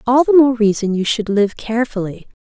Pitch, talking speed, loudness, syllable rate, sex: 230 Hz, 195 wpm, -16 LUFS, 5.6 syllables/s, female